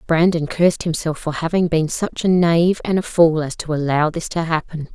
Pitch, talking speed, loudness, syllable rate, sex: 165 Hz, 205 wpm, -18 LUFS, 5.1 syllables/s, female